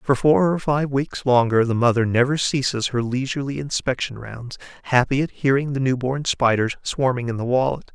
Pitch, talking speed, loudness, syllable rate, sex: 130 Hz, 190 wpm, -21 LUFS, 5.2 syllables/s, male